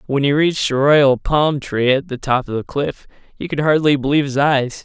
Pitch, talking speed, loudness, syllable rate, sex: 140 Hz, 235 wpm, -17 LUFS, 5.2 syllables/s, male